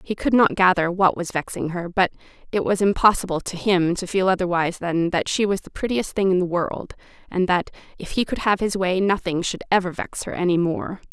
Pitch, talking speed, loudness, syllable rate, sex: 185 Hz, 225 wpm, -21 LUFS, 5.5 syllables/s, female